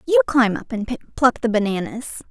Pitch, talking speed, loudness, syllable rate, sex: 240 Hz, 180 wpm, -20 LUFS, 5.3 syllables/s, female